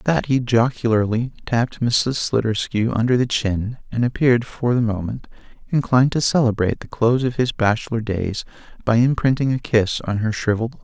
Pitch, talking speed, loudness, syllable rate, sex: 120 Hz, 175 wpm, -20 LUFS, 5.6 syllables/s, male